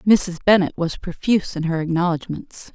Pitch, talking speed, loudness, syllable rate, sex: 180 Hz, 155 wpm, -20 LUFS, 5.0 syllables/s, female